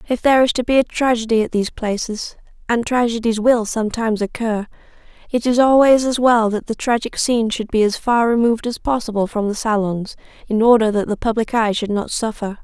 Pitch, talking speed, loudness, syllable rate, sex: 225 Hz, 195 wpm, -18 LUFS, 5.8 syllables/s, female